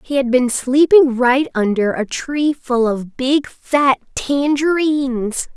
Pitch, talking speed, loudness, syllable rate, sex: 265 Hz, 140 wpm, -16 LUFS, 3.5 syllables/s, female